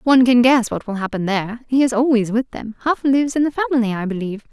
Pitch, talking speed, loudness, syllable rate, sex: 240 Hz, 250 wpm, -18 LUFS, 6.9 syllables/s, female